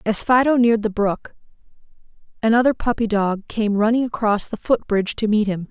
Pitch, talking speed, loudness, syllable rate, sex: 220 Hz, 180 wpm, -19 LUFS, 5.5 syllables/s, female